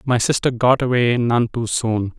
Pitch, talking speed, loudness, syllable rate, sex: 120 Hz, 190 wpm, -18 LUFS, 4.4 syllables/s, male